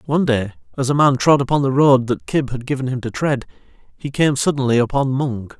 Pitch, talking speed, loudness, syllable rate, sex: 130 Hz, 225 wpm, -18 LUFS, 5.8 syllables/s, male